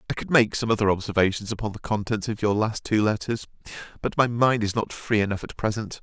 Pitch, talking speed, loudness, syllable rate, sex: 105 Hz, 230 wpm, -24 LUFS, 6.1 syllables/s, male